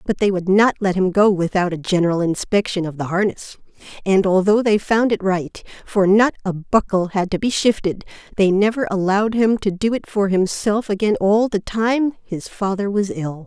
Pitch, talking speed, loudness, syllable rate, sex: 200 Hz, 200 wpm, -18 LUFS, 5.0 syllables/s, female